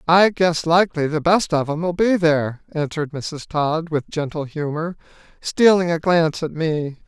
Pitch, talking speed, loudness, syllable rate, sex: 160 Hz, 170 wpm, -20 LUFS, 4.6 syllables/s, male